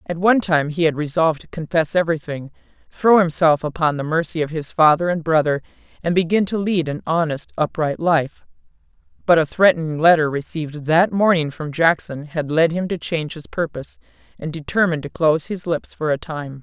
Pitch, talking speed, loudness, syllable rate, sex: 160 Hz, 190 wpm, -19 LUFS, 5.6 syllables/s, female